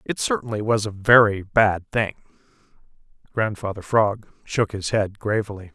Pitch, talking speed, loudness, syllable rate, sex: 105 Hz, 135 wpm, -21 LUFS, 4.6 syllables/s, male